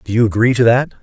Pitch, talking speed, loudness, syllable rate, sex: 115 Hz, 290 wpm, -13 LUFS, 7.1 syllables/s, male